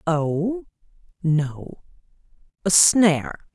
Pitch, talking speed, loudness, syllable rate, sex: 175 Hz, 70 wpm, -20 LUFS, 2.6 syllables/s, female